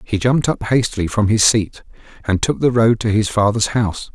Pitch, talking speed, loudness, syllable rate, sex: 110 Hz, 215 wpm, -17 LUFS, 5.5 syllables/s, male